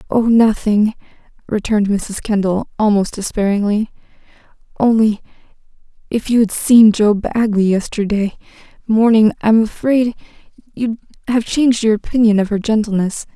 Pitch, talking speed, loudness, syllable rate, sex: 215 Hz, 110 wpm, -15 LUFS, 4.8 syllables/s, female